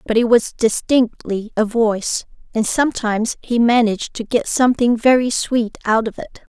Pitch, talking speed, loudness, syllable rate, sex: 230 Hz, 165 wpm, -17 LUFS, 4.9 syllables/s, female